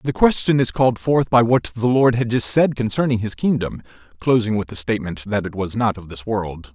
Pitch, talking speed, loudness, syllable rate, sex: 110 Hz, 230 wpm, -19 LUFS, 5.4 syllables/s, male